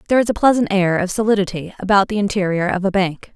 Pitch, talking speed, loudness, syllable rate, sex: 195 Hz, 230 wpm, -17 LUFS, 6.8 syllables/s, female